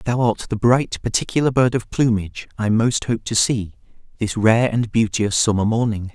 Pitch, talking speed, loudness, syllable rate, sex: 110 Hz, 185 wpm, -19 LUFS, 5.1 syllables/s, male